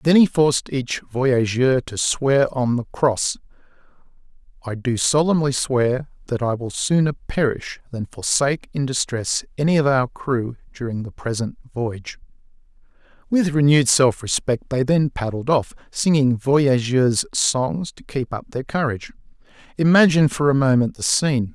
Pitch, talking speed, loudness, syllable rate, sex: 135 Hz, 150 wpm, -20 LUFS, 4.5 syllables/s, male